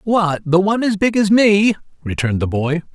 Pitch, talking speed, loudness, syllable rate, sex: 180 Hz, 205 wpm, -16 LUFS, 5.4 syllables/s, male